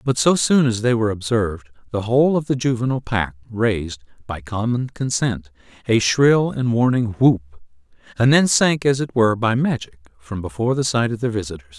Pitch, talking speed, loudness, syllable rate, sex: 115 Hz, 190 wpm, -19 LUFS, 5.4 syllables/s, male